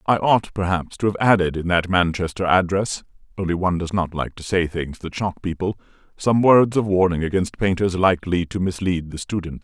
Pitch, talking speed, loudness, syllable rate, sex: 90 Hz, 200 wpm, -21 LUFS, 4.1 syllables/s, male